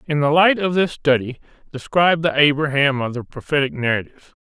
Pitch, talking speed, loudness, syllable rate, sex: 145 Hz, 175 wpm, -18 LUFS, 5.9 syllables/s, male